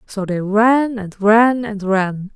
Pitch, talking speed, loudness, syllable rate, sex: 210 Hz, 180 wpm, -16 LUFS, 3.2 syllables/s, female